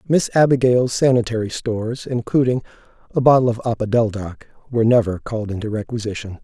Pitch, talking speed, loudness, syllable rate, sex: 115 Hz, 130 wpm, -19 LUFS, 6.0 syllables/s, male